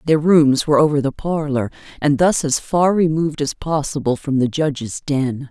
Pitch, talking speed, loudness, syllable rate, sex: 145 Hz, 185 wpm, -18 LUFS, 5.0 syllables/s, female